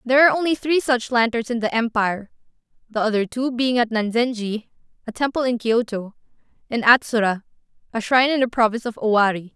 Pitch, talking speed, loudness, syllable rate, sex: 235 Hz, 170 wpm, -20 LUFS, 6.2 syllables/s, female